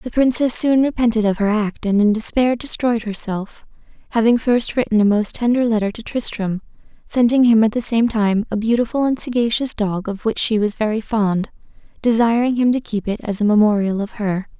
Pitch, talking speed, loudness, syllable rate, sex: 225 Hz, 195 wpm, -18 LUFS, 5.3 syllables/s, female